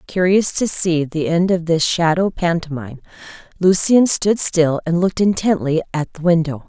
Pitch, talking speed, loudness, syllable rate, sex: 170 Hz, 160 wpm, -17 LUFS, 4.8 syllables/s, female